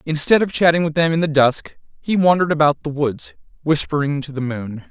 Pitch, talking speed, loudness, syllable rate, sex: 150 Hz, 210 wpm, -18 LUFS, 5.7 syllables/s, male